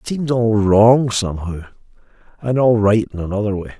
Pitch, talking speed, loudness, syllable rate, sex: 110 Hz, 160 wpm, -16 LUFS, 5.7 syllables/s, male